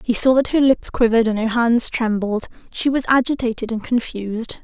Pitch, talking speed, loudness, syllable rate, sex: 235 Hz, 195 wpm, -18 LUFS, 5.4 syllables/s, female